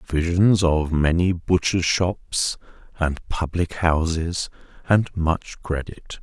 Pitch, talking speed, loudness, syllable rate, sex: 85 Hz, 105 wpm, -22 LUFS, 3.2 syllables/s, male